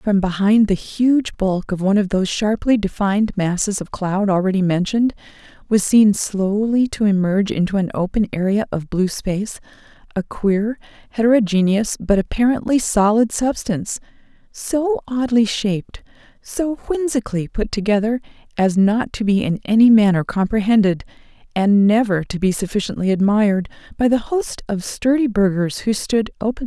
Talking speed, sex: 150 wpm, female